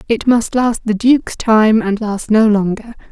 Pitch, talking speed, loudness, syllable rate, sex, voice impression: 220 Hz, 195 wpm, -14 LUFS, 4.3 syllables/s, female, very feminine, slightly young, very thin, relaxed, slightly powerful, bright, slightly hard, clear, fluent, slightly raspy, very cute, intellectual, very refreshing, sincere, very calm, friendly, reassuring, very unique, very elegant, slightly wild, very sweet, slightly lively, kind, slightly intense, modest